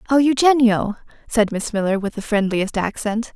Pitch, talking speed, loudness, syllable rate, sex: 225 Hz, 160 wpm, -19 LUFS, 5.0 syllables/s, female